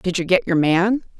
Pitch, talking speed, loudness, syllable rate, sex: 185 Hz, 250 wpm, -18 LUFS, 4.8 syllables/s, female